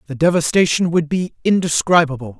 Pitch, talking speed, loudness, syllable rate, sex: 160 Hz, 125 wpm, -16 LUFS, 5.7 syllables/s, male